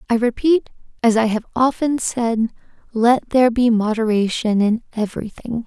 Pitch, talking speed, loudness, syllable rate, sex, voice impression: 230 Hz, 140 wpm, -18 LUFS, 4.9 syllables/s, female, feminine, young, slightly bright, slightly clear, cute, friendly, slightly lively